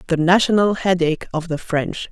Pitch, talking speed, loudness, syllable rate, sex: 175 Hz, 170 wpm, -18 LUFS, 5.4 syllables/s, female